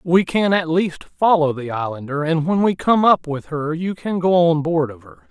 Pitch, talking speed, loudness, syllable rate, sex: 160 Hz, 240 wpm, -19 LUFS, 4.6 syllables/s, male